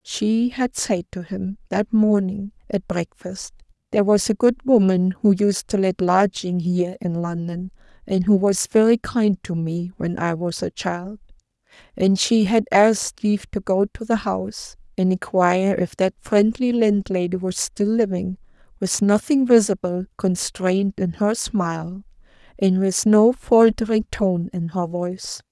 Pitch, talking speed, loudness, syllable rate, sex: 195 Hz, 160 wpm, -20 LUFS, 4.3 syllables/s, female